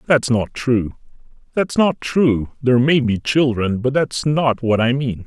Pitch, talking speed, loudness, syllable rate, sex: 125 Hz, 180 wpm, -18 LUFS, 4.1 syllables/s, male